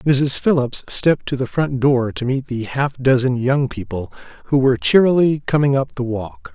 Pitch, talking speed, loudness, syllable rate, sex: 130 Hz, 195 wpm, -18 LUFS, 4.8 syllables/s, male